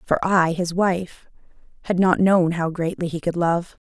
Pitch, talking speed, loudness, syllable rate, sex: 175 Hz, 185 wpm, -21 LUFS, 4.3 syllables/s, female